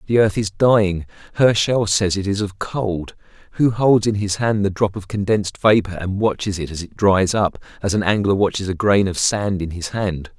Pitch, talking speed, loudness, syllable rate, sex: 100 Hz, 220 wpm, -19 LUFS, 5.0 syllables/s, male